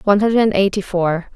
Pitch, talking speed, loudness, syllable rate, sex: 195 Hz, 175 wpm, -16 LUFS, 5.8 syllables/s, female